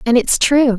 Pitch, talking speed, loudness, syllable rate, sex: 245 Hz, 230 wpm, -13 LUFS, 4.5 syllables/s, female